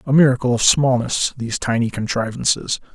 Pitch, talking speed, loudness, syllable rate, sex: 125 Hz, 145 wpm, -18 LUFS, 5.7 syllables/s, male